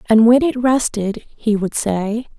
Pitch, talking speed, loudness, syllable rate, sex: 225 Hz, 175 wpm, -17 LUFS, 3.8 syllables/s, female